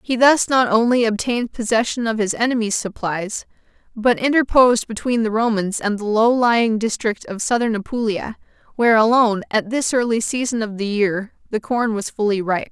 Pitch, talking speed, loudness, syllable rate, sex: 225 Hz, 175 wpm, -19 LUFS, 5.3 syllables/s, female